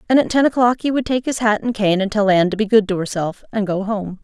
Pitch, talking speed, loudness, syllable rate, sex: 215 Hz, 310 wpm, -18 LUFS, 6.3 syllables/s, female